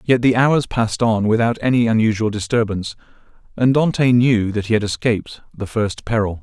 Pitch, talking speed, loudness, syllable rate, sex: 115 Hz, 175 wpm, -18 LUFS, 5.6 syllables/s, male